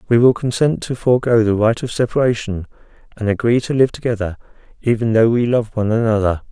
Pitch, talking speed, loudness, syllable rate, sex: 115 Hz, 185 wpm, -17 LUFS, 6.2 syllables/s, male